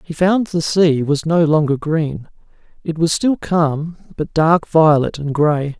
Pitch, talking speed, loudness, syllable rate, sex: 160 Hz, 175 wpm, -16 LUFS, 3.9 syllables/s, male